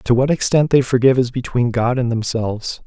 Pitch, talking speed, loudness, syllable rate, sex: 125 Hz, 210 wpm, -17 LUFS, 5.7 syllables/s, male